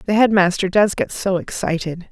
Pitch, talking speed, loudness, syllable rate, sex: 190 Hz, 170 wpm, -18 LUFS, 5.1 syllables/s, female